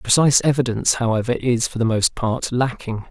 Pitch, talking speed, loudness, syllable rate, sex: 120 Hz, 175 wpm, -19 LUFS, 5.6 syllables/s, male